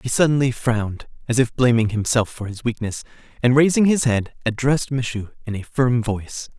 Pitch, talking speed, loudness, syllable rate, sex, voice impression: 120 Hz, 180 wpm, -20 LUFS, 5.5 syllables/s, male, very masculine, very adult-like, slightly thick, very tensed, slightly powerful, very bright, soft, very clear, very fluent, slightly raspy, cool, intellectual, very refreshing, sincere, slightly calm, very friendly, very reassuring, unique, elegant, wild, sweet, very lively, kind, intense